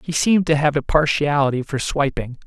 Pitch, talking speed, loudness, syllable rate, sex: 145 Hz, 195 wpm, -19 LUFS, 5.6 syllables/s, male